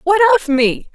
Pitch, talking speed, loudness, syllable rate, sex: 350 Hz, 190 wpm, -14 LUFS, 3.6 syllables/s, female